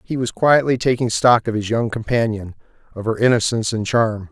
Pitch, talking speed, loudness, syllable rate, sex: 115 Hz, 180 wpm, -18 LUFS, 5.5 syllables/s, male